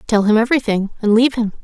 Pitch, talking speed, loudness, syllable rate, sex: 225 Hz, 220 wpm, -16 LUFS, 7.5 syllables/s, female